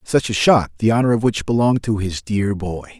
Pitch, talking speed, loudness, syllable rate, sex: 105 Hz, 240 wpm, -18 LUFS, 5.4 syllables/s, male